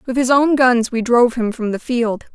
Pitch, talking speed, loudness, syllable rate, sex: 240 Hz, 255 wpm, -16 LUFS, 5.2 syllables/s, female